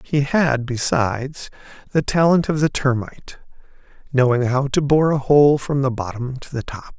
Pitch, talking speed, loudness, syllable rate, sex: 135 Hz, 165 wpm, -19 LUFS, 4.7 syllables/s, male